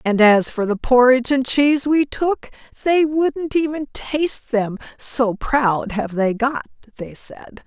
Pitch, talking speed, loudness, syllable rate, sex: 255 Hz, 165 wpm, -18 LUFS, 3.9 syllables/s, female